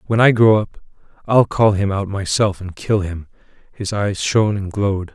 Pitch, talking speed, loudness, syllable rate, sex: 100 Hz, 200 wpm, -17 LUFS, 4.8 syllables/s, male